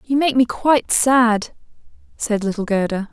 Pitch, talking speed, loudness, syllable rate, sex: 235 Hz, 155 wpm, -18 LUFS, 4.6 syllables/s, female